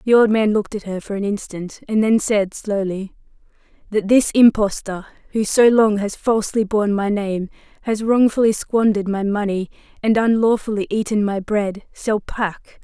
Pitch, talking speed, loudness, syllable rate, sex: 210 Hz, 170 wpm, -19 LUFS, 4.9 syllables/s, female